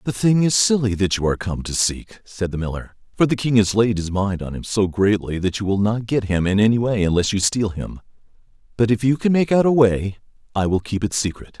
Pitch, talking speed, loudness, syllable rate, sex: 105 Hz, 260 wpm, -20 LUFS, 5.6 syllables/s, male